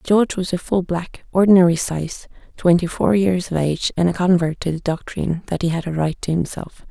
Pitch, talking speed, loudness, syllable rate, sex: 175 Hz, 215 wpm, -19 LUFS, 5.6 syllables/s, female